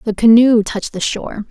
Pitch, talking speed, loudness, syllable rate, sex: 220 Hz, 200 wpm, -13 LUFS, 5.8 syllables/s, female